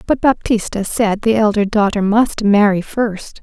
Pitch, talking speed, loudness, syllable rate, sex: 210 Hz, 160 wpm, -15 LUFS, 4.3 syllables/s, female